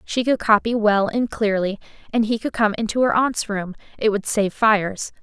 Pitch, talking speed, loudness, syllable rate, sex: 215 Hz, 195 wpm, -20 LUFS, 5.0 syllables/s, female